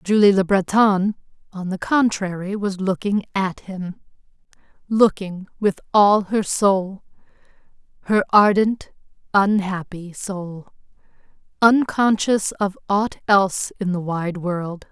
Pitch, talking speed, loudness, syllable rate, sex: 195 Hz, 100 wpm, -20 LUFS, 3.7 syllables/s, female